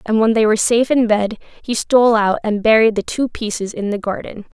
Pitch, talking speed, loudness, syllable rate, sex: 220 Hz, 235 wpm, -16 LUFS, 5.8 syllables/s, female